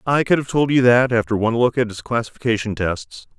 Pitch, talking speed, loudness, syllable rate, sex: 120 Hz, 230 wpm, -19 LUFS, 6.0 syllables/s, male